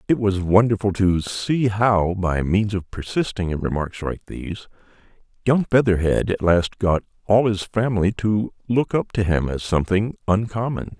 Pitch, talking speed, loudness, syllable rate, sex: 100 Hz, 165 wpm, -21 LUFS, 4.6 syllables/s, male